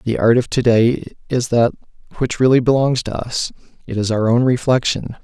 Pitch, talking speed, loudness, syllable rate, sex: 120 Hz, 195 wpm, -17 LUFS, 5.3 syllables/s, male